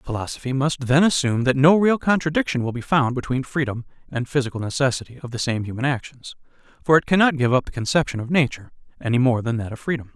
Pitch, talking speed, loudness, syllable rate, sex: 135 Hz, 215 wpm, -21 LUFS, 6.6 syllables/s, male